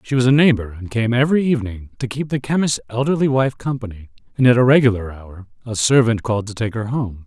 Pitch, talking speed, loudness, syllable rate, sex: 120 Hz, 225 wpm, -18 LUFS, 6.4 syllables/s, male